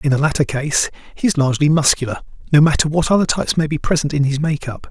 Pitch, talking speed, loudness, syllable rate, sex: 150 Hz, 230 wpm, -17 LUFS, 6.7 syllables/s, male